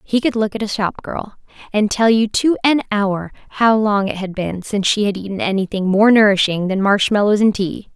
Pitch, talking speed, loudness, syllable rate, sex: 205 Hz, 220 wpm, -17 LUFS, 5.3 syllables/s, female